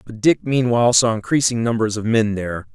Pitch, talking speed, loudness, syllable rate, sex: 115 Hz, 195 wpm, -18 LUFS, 5.9 syllables/s, male